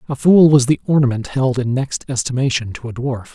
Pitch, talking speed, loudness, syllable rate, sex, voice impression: 130 Hz, 215 wpm, -16 LUFS, 5.5 syllables/s, male, masculine, adult-like, relaxed, weak, slightly dark, slightly muffled, sincere, calm, friendly, kind, modest